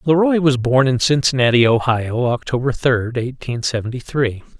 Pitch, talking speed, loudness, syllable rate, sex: 130 Hz, 155 wpm, -17 LUFS, 4.8 syllables/s, male